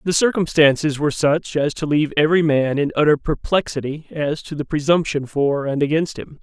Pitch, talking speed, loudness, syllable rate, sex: 150 Hz, 185 wpm, -19 LUFS, 5.5 syllables/s, male